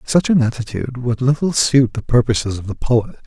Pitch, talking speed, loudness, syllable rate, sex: 120 Hz, 200 wpm, -17 LUFS, 5.5 syllables/s, male